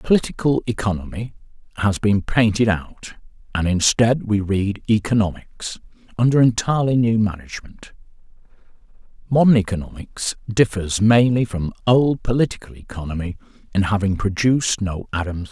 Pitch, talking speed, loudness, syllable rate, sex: 105 Hz, 110 wpm, -19 LUFS, 5.2 syllables/s, male